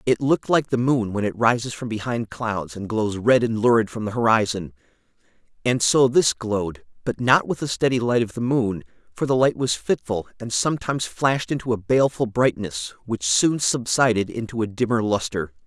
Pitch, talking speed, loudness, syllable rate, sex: 120 Hz, 195 wpm, -22 LUFS, 5.3 syllables/s, male